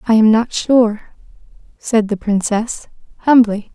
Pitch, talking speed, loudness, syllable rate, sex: 220 Hz, 130 wpm, -15 LUFS, 3.9 syllables/s, female